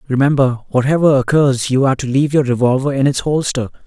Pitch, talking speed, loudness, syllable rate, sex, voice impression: 135 Hz, 185 wpm, -15 LUFS, 6.3 syllables/s, male, masculine, adult-like, slightly thick, slightly cool, sincere, slightly calm, slightly elegant